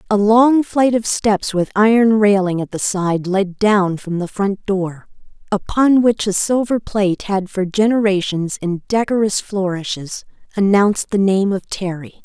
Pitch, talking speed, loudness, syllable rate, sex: 200 Hz, 160 wpm, -17 LUFS, 4.3 syllables/s, female